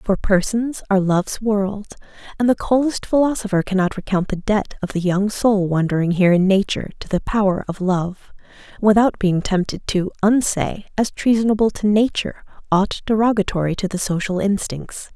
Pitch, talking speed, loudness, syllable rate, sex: 200 Hz, 160 wpm, -19 LUFS, 5.3 syllables/s, female